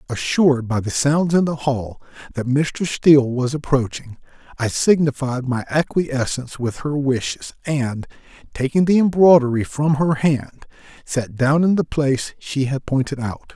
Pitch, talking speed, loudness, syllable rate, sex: 135 Hz, 155 wpm, -19 LUFS, 4.5 syllables/s, male